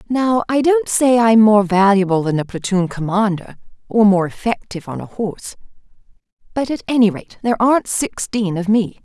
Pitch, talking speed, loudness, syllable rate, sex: 210 Hz, 175 wpm, -16 LUFS, 5.2 syllables/s, female